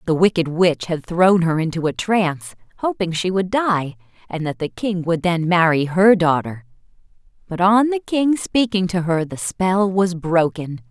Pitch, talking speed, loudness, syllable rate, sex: 180 Hz, 180 wpm, -18 LUFS, 4.4 syllables/s, female